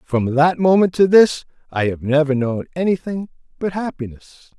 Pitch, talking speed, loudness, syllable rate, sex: 160 Hz, 155 wpm, -18 LUFS, 4.8 syllables/s, male